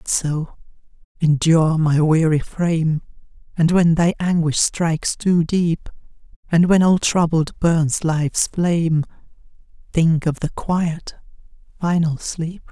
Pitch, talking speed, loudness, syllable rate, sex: 165 Hz, 125 wpm, -18 LUFS, 3.9 syllables/s, female